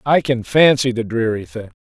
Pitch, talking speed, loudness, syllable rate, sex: 130 Hz, 195 wpm, -17 LUFS, 4.9 syllables/s, female